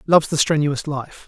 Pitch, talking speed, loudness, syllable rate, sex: 150 Hz, 190 wpm, -20 LUFS, 5.3 syllables/s, male